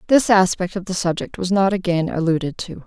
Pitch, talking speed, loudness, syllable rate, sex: 185 Hz, 210 wpm, -19 LUFS, 5.6 syllables/s, female